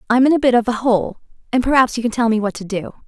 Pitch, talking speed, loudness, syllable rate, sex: 235 Hz, 315 wpm, -17 LUFS, 7.0 syllables/s, female